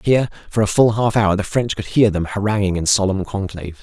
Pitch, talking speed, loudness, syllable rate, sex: 100 Hz, 235 wpm, -18 LUFS, 6.0 syllables/s, male